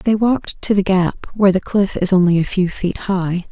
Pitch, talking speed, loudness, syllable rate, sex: 190 Hz, 240 wpm, -17 LUFS, 5.1 syllables/s, female